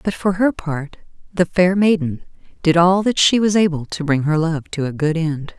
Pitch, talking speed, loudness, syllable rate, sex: 170 Hz, 225 wpm, -18 LUFS, 4.8 syllables/s, female